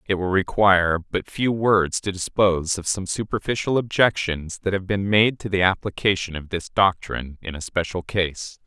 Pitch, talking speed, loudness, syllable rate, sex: 95 Hz, 180 wpm, -22 LUFS, 4.9 syllables/s, male